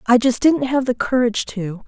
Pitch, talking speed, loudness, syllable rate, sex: 245 Hz, 225 wpm, -18 LUFS, 5.2 syllables/s, female